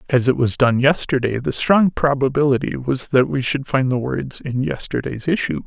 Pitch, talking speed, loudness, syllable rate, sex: 135 Hz, 190 wpm, -19 LUFS, 4.9 syllables/s, male